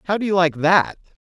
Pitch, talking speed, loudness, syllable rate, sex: 175 Hz, 235 wpm, -18 LUFS, 5.9 syllables/s, female